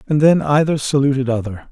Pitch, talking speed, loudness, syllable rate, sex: 135 Hz, 175 wpm, -16 LUFS, 5.7 syllables/s, male